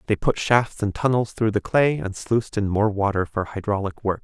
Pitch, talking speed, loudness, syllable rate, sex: 105 Hz, 225 wpm, -22 LUFS, 5.2 syllables/s, male